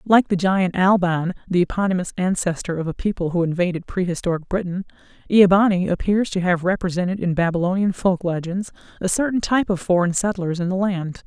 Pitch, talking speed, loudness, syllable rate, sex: 185 Hz, 175 wpm, -20 LUFS, 5.8 syllables/s, female